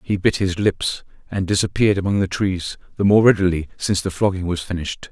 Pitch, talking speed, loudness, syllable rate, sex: 95 Hz, 200 wpm, -20 LUFS, 6.0 syllables/s, male